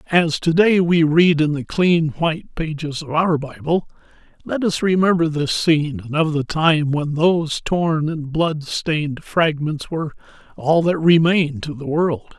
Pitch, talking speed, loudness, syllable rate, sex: 160 Hz, 175 wpm, -19 LUFS, 4.3 syllables/s, male